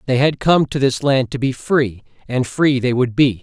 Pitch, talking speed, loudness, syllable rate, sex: 130 Hz, 245 wpm, -17 LUFS, 4.6 syllables/s, male